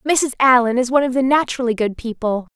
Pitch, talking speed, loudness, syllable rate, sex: 250 Hz, 210 wpm, -17 LUFS, 6.2 syllables/s, female